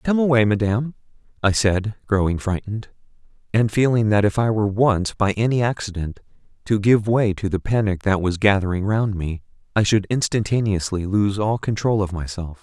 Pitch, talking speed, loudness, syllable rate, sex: 105 Hz, 170 wpm, -20 LUFS, 5.3 syllables/s, male